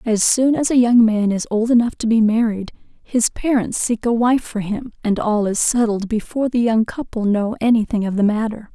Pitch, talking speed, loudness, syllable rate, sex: 225 Hz, 225 wpm, -18 LUFS, 5.1 syllables/s, female